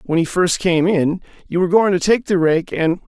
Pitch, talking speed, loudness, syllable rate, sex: 180 Hz, 250 wpm, -17 LUFS, 5.3 syllables/s, male